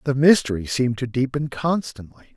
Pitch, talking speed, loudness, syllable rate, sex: 130 Hz, 155 wpm, -21 LUFS, 5.6 syllables/s, male